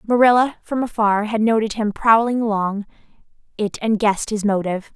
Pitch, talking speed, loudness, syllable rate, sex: 215 Hz, 155 wpm, -19 LUFS, 5.5 syllables/s, female